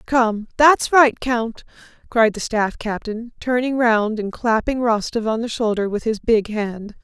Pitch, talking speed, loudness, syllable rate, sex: 230 Hz, 170 wpm, -19 LUFS, 4.0 syllables/s, female